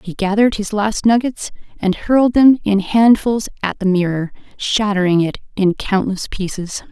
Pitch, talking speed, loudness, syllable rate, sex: 205 Hz, 155 wpm, -16 LUFS, 4.8 syllables/s, female